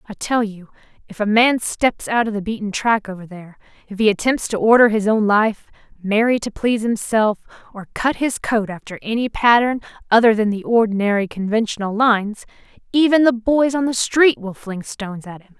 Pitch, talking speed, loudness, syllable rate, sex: 220 Hz, 185 wpm, -18 LUFS, 5.3 syllables/s, female